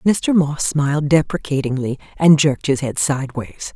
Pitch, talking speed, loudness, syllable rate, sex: 145 Hz, 145 wpm, -18 LUFS, 4.8 syllables/s, female